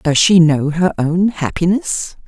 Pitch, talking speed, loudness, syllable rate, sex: 170 Hz, 160 wpm, -15 LUFS, 3.8 syllables/s, female